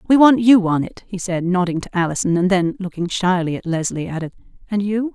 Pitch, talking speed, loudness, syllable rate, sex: 190 Hz, 220 wpm, -18 LUFS, 5.7 syllables/s, female